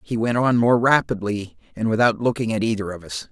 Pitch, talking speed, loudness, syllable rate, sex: 110 Hz, 215 wpm, -21 LUFS, 5.6 syllables/s, male